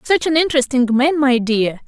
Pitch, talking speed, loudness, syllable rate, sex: 270 Hz, 190 wpm, -16 LUFS, 5.4 syllables/s, female